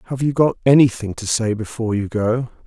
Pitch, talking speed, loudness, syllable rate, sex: 120 Hz, 205 wpm, -18 LUFS, 5.8 syllables/s, male